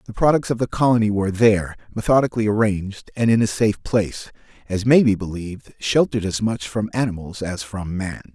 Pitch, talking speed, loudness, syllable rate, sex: 105 Hz, 185 wpm, -20 LUFS, 6.1 syllables/s, male